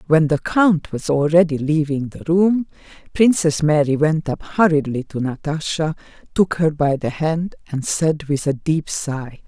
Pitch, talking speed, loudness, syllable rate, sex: 155 Hz, 165 wpm, -19 LUFS, 4.2 syllables/s, female